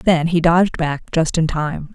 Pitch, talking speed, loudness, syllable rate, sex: 165 Hz, 215 wpm, -18 LUFS, 4.4 syllables/s, female